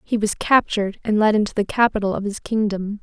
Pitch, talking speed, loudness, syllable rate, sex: 210 Hz, 220 wpm, -20 LUFS, 6.0 syllables/s, female